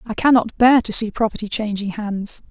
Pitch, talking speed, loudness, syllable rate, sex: 220 Hz, 190 wpm, -18 LUFS, 5.1 syllables/s, female